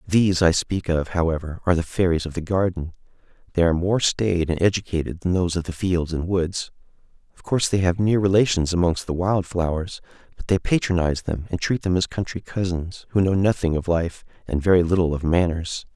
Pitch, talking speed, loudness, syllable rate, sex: 90 Hz, 205 wpm, -22 LUFS, 5.7 syllables/s, male